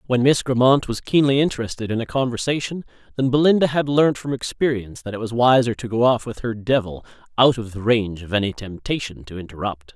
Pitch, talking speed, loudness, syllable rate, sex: 120 Hz, 205 wpm, -20 LUFS, 6.0 syllables/s, male